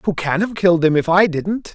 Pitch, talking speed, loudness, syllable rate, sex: 180 Hz, 275 wpm, -17 LUFS, 5.3 syllables/s, male